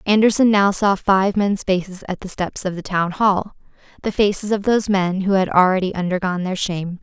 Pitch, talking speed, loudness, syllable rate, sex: 190 Hz, 205 wpm, -19 LUFS, 5.5 syllables/s, female